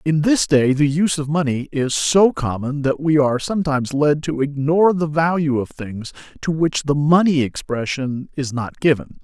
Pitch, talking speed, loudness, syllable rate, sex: 145 Hz, 190 wpm, -19 LUFS, 4.9 syllables/s, male